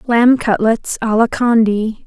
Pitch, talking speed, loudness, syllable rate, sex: 225 Hz, 145 wpm, -14 LUFS, 3.6 syllables/s, female